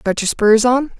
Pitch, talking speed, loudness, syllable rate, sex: 235 Hz, 240 wpm, -14 LUFS, 4.7 syllables/s, female